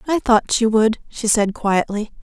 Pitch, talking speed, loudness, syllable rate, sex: 220 Hz, 190 wpm, -18 LUFS, 4.2 syllables/s, female